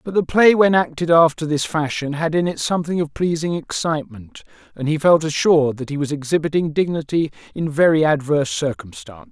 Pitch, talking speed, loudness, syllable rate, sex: 155 Hz, 180 wpm, -18 LUFS, 5.8 syllables/s, male